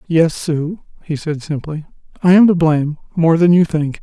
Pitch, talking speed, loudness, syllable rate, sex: 160 Hz, 180 wpm, -15 LUFS, 4.9 syllables/s, male